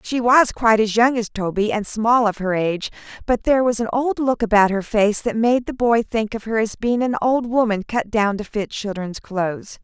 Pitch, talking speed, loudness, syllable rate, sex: 220 Hz, 240 wpm, -19 LUFS, 5.1 syllables/s, female